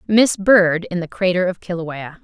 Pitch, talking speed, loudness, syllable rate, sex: 180 Hz, 190 wpm, -17 LUFS, 4.5 syllables/s, female